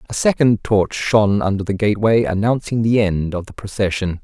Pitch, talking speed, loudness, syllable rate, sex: 105 Hz, 185 wpm, -17 LUFS, 5.5 syllables/s, male